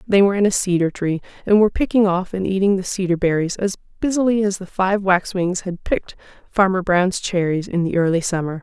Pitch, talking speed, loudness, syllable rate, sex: 190 Hz, 210 wpm, -19 LUFS, 5.9 syllables/s, female